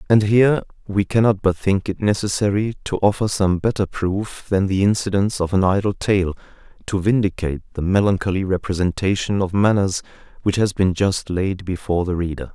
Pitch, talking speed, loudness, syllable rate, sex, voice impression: 95 Hz, 165 wpm, -20 LUFS, 5.3 syllables/s, male, masculine, adult-like, cool, sincere, slightly calm